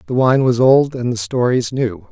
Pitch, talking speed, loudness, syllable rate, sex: 125 Hz, 225 wpm, -15 LUFS, 4.7 syllables/s, male